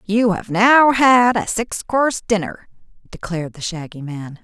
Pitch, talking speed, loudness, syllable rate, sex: 205 Hz, 160 wpm, -17 LUFS, 4.4 syllables/s, female